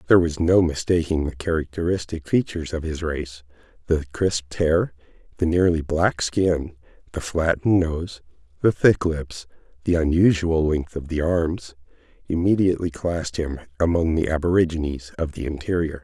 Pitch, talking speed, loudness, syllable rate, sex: 80 Hz, 140 wpm, -22 LUFS, 5.1 syllables/s, male